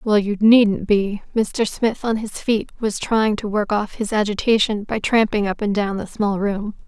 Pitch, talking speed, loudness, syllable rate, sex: 210 Hz, 210 wpm, -20 LUFS, 4.3 syllables/s, female